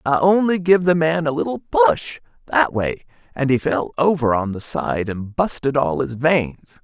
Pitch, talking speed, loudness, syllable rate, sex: 145 Hz, 175 wpm, -19 LUFS, 4.3 syllables/s, male